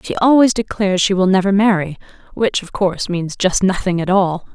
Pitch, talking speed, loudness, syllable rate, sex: 190 Hz, 200 wpm, -16 LUFS, 5.4 syllables/s, female